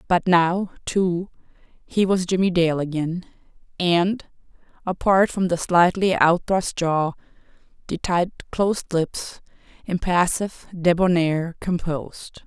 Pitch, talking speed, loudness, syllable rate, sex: 175 Hz, 105 wpm, -21 LUFS, 3.7 syllables/s, female